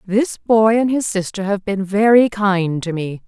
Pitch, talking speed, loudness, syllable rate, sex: 200 Hz, 200 wpm, -17 LUFS, 4.3 syllables/s, female